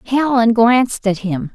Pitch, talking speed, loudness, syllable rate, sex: 230 Hz, 155 wpm, -15 LUFS, 4.0 syllables/s, female